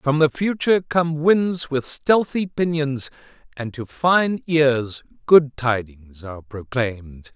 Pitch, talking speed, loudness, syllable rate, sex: 140 Hz, 130 wpm, -20 LUFS, 3.7 syllables/s, male